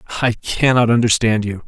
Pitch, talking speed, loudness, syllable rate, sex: 115 Hz, 145 wpm, -16 LUFS, 5.7 syllables/s, male